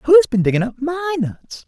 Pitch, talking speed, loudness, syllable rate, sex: 275 Hz, 215 wpm, -18 LUFS, 5.0 syllables/s, male